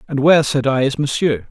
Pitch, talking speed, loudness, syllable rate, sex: 135 Hz, 240 wpm, -16 LUFS, 5.9 syllables/s, male